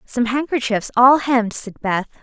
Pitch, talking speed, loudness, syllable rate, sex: 240 Hz, 160 wpm, -18 LUFS, 4.7 syllables/s, female